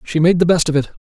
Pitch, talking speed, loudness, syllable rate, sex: 165 Hz, 345 wpm, -15 LUFS, 7.0 syllables/s, male